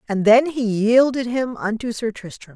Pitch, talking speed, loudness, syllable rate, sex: 230 Hz, 190 wpm, -19 LUFS, 4.6 syllables/s, female